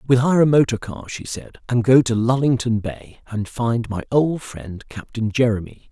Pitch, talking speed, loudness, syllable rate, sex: 120 Hz, 195 wpm, -20 LUFS, 4.8 syllables/s, male